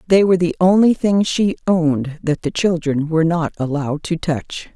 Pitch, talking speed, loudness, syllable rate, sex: 165 Hz, 190 wpm, -17 LUFS, 5.1 syllables/s, female